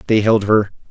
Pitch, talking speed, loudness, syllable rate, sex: 105 Hz, 200 wpm, -15 LUFS, 5.3 syllables/s, male